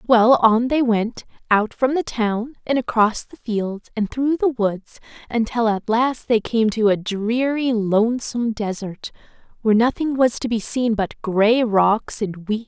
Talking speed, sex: 185 wpm, female